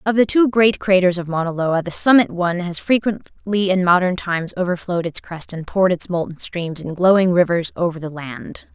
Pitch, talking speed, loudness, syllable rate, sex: 180 Hz, 205 wpm, -18 LUFS, 5.4 syllables/s, female